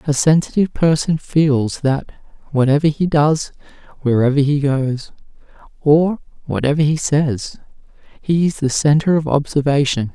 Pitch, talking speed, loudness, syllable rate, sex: 145 Hz, 125 wpm, -17 LUFS, 4.4 syllables/s, male